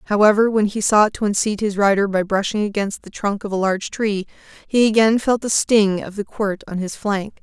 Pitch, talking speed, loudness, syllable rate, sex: 205 Hz, 225 wpm, -19 LUFS, 5.4 syllables/s, female